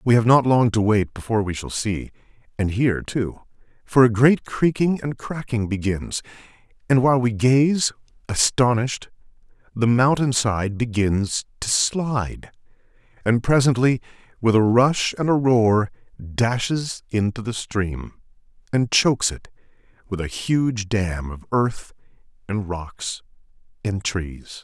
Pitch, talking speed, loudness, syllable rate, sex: 115 Hz, 135 wpm, -21 LUFS, 4.1 syllables/s, male